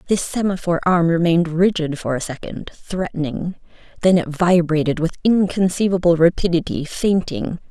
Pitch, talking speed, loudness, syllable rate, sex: 170 Hz, 125 wpm, -19 LUFS, 5.1 syllables/s, female